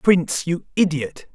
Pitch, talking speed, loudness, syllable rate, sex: 165 Hz, 135 wpm, -21 LUFS, 4.2 syllables/s, male